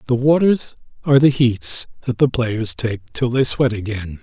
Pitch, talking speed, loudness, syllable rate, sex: 120 Hz, 185 wpm, -18 LUFS, 4.6 syllables/s, male